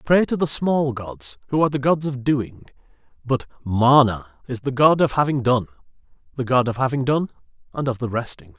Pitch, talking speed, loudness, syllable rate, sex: 130 Hz, 190 wpm, -21 LUFS, 5.3 syllables/s, male